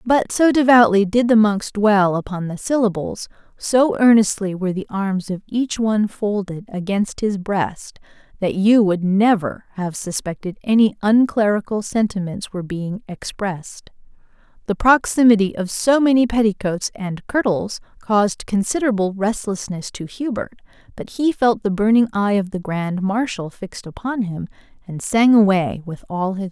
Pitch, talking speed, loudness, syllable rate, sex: 205 Hz, 150 wpm, -19 LUFS, 4.7 syllables/s, female